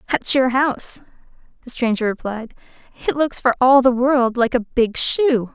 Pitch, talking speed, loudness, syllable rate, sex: 250 Hz, 175 wpm, -18 LUFS, 4.5 syllables/s, female